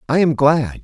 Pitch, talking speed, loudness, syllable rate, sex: 145 Hz, 215 wpm, -15 LUFS, 4.6 syllables/s, male